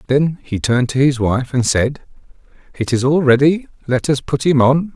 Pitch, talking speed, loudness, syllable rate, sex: 135 Hz, 205 wpm, -16 LUFS, 4.9 syllables/s, male